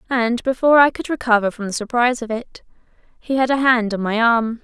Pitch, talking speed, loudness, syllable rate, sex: 235 Hz, 220 wpm, -18 LUFS, 5.9 syllables/s, female